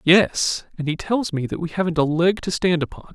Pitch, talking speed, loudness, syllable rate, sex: 170 Hz, 250 wpm, -21 LUFS, 5.1 syllables/s, male